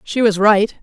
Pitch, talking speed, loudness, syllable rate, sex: 210 Hz, 220 wpm, -14 LUFS, 4.5 syllables/s, female